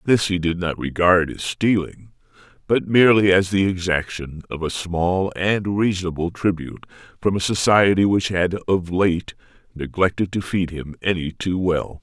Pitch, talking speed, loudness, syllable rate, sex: 90 Hz, 160 wpm, -20 LUFS, 4.7 syllables/s, male